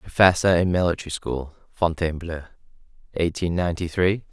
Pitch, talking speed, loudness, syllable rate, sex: 85 Hz, 110 wpm, -23 LUFS, 6.2 syllables/s, male